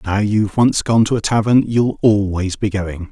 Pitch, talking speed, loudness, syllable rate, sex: 105 Hz, 210 wpm, -16 LUFS, 4.8 syllables/s, male